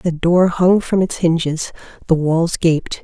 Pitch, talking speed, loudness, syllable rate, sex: 170 Hz, 180 wpm, -16 LUFS, 3.8 syllables/s, female